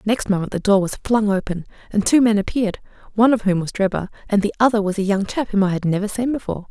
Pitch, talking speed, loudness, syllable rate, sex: 205 Hz, 260 wpm, -19 LUFS, 7.0 syllables/s, female